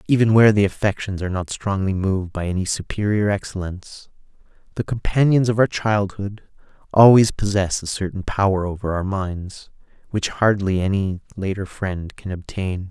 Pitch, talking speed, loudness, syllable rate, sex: 100 Hz, 150 wpm, -20 LUFS, 5.1 syllables/s, male